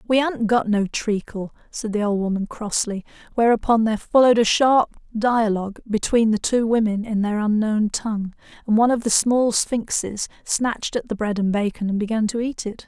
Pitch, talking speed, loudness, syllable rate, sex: 220 Hz, 190 wpm, -21 LUFS, 5.2 syllables/s, female